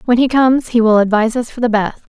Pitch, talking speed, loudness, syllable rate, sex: 235 Hz, 280 wpm, -14 LUFS, 6.8 syllables/s, female